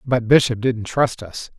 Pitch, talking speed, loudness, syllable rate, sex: 120 Hz, 190 wpm, -18 LUFS, 4.2 syllables/s, male